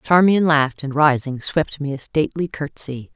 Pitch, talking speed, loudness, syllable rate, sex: 145 Hz, 170 wpm, -19 LUFS, 5.3 syllables/s, female